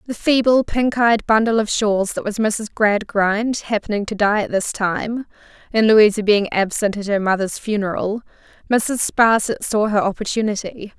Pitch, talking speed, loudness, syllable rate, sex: 215 Hz, 165 wpm, -18 LUFS, 4.6 syllables/s, female